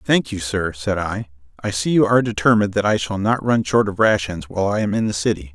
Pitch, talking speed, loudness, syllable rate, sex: 100 Hz, 260 wpm, -19 LUFS, 6.0 syllables/s, male